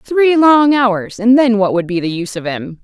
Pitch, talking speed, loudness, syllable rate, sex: 235 Hz, 255 wpm, -13 LUFS, 4.8 syllables/s, female